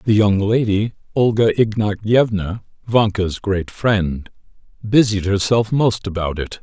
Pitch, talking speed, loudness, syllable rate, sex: 105 Hz, 120 wpm, -18 LUFS, 3.9 syllables/s, male